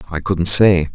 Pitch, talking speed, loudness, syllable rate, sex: 90 Hz, 190 wpm, -14 LUFS, 4.2 syllables/s, male